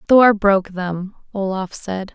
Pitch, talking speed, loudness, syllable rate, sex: 195 Hz, 140 wpm, -18 LUFS, 3.9 syllables/s, female